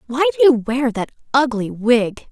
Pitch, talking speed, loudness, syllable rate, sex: 245 Hz, 180 wpm, -17 LUFS, 4.4 syllables/s, female